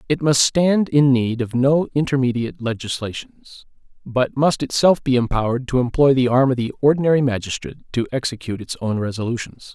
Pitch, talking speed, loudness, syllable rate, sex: 130 Hz, 165 wpm, -19 LUFS, 5.7 syllables/s, male